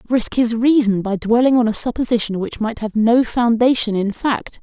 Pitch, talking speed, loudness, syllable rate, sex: 230 Hz, 195 wpm, -17 LUFS, 5.0 syllables/s, female